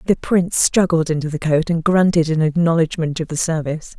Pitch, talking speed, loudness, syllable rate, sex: 165 Hz, 195 wpm, -18 LUFS, 5.8 syllables/s, female